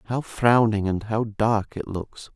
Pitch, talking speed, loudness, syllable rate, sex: 110 Hz, 180 wpm, -23 LUFS, 3.7 syllables/s, male